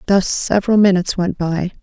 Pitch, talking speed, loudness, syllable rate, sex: 185 Hz, 165 wpm, -16 LUFS, 5.8 syllables/s, female